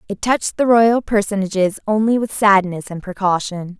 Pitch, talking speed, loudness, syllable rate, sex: 205 Hz, 160 wpm, -17 LUFS, 5.2 syllables/s, female